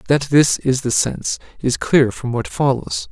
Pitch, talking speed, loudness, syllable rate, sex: 135 Hz, 195 wpm, -18 LUFS, 4.4 syllables/s, male